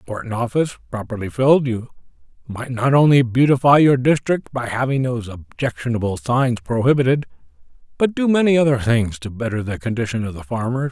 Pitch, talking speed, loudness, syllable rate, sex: 120 Hz, 170 wpm, -19 LUFS, 6.1 syllables/s, male